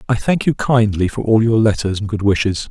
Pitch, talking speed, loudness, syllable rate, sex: 110 Hz, 245 wpm, -16 LUFS, 5.5 syllables/s, male